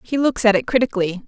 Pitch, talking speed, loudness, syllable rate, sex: 225 Hz, 235 wpm, -18 LUFS, 7.0 syllables/s, female